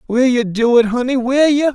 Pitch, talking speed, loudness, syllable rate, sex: 250 Hz, 240 wpm, -14 LUFS, 5.0 syllables/s, male